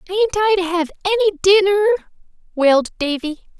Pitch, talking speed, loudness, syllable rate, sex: 370 Hz, 135 wpm, -17 LUFS, 7.3 syllables/s, female